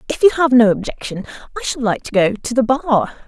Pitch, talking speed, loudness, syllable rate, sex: 235 Hz, 240 wpm, -16 LUFS, 5.9 syllables/s, female